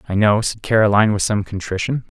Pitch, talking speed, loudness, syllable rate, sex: 105 Hz, 190 wpm, -18 LUFS, 6.3 syllables/s, male